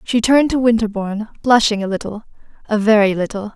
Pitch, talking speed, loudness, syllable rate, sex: 215 Hz, 150 wpm, -16 LUFS, 6.2 syllables/s, female